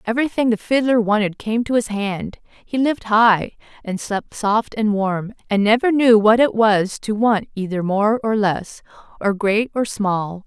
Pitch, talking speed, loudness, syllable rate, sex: 215 Hz, 185 wpm, -18 LUFS, 4.3 syllables/s, female